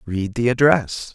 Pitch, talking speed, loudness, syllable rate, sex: 115 Hz, 155 wpm, -18 LUFS, 3.9 syllables/s, male